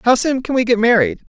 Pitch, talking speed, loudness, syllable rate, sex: 240 Hz, 275 wpm, -15 LUFS, 6.4 syllables/s, female